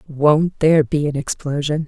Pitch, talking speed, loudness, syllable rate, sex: 150 Hz, 160 wpm, -18 LUFS, 4.7 syllables/s, female